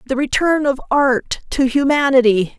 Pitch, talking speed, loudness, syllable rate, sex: 265 Hz, 140 wpm, -16 LUFS, 4.5 syllables/s, female